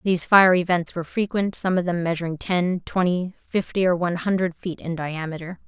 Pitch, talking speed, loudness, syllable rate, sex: 175 Hz, 190 wpm, -22 LUFS, 5.5 syllables/s, female